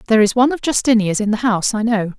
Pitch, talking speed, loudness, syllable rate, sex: 225 Hz, 275 wpm, -16 LUFS, 7.5 syllables/s, female